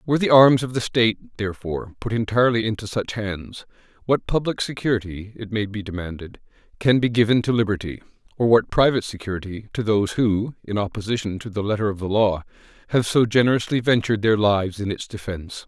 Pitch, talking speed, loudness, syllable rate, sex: 110 Hz, 185 wpm, -21 LUFS, 6.2 syllables/s, male